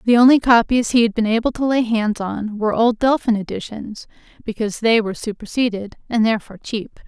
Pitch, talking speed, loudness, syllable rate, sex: 225 Hz, 185 wpm, -18 LUFS, 6.0 syllables/s, female